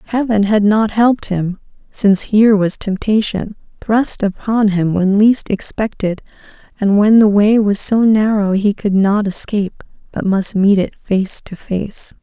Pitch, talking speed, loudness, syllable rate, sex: 205 Hz, 160 wpm, -14 LUFS, 4.3 syllables/s, female